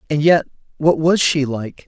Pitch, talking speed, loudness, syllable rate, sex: 150 Hz, 160 wpm, -17 LUFS, 4.5 syllables/s, male